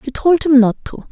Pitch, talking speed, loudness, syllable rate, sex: 275 Hz, 270 wpm, -13 LUFS, 5.4 syllables/s, female